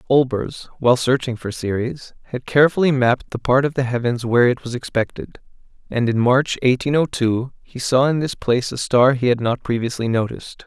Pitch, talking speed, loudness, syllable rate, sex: 125 Hz, 195 wpm, -19 LUFS, 5.5 syllables/s, male